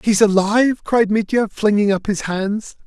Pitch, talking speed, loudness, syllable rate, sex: 210 Hz, 170 wpm, -17 LUFS, 4.5 syllables/s, male